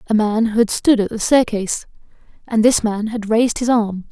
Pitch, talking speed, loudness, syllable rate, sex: 220 Hz, 205 wpm, -17 LUFS, 5.1 syllables/s, female